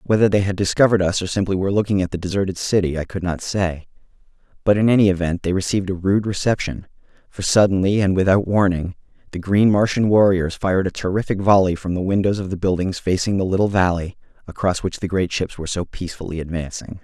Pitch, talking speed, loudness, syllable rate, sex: 95 Hz, 205 wpm, -19 LUFS, 6.4 syllables/s, male